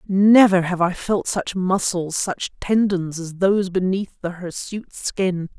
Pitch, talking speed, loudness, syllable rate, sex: 185 Hz, 150 wpm, -20 LUFS, 4.0 syllables/s, female